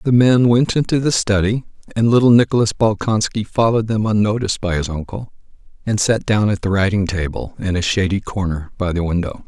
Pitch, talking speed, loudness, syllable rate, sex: 105 Hz, 190 wpm, -17 LUFS, 5.8 syllables/s, male